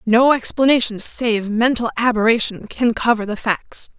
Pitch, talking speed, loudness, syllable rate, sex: 230 Hz, 135 wpm, -17 LUFS, 4.6 syllables/s, female